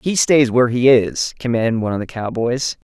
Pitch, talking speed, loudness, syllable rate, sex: 120 Hz, 205 wpm, -17 LUFS, 5.5 syllables/s, male